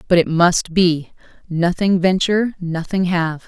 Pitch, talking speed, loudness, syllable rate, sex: 175 Hz, 105 wpm, -17 LUFS, 4.3 syllables/s, female